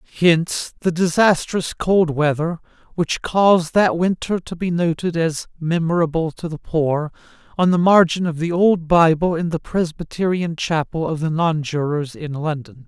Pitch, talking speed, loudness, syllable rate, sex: 165 Hz, 155 wpm, -19 LUFS, 4.6 syllables/s, male